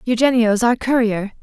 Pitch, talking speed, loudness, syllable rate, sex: 230 Hz, 125 wpm, -17 LUFS, 4.9 syllables/s, female